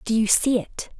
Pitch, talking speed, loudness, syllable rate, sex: 225 Hz, 240 wpm, -20 LUFS, 4.8 syllables/s, female